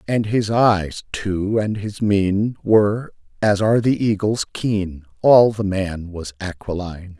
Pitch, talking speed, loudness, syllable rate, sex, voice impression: 100 Hz, 150 wpm, -19 LUFS, 3.9 syllables/s, male, masculine, middle-aged, slightly thick, cool, slightly elegant, slightly wild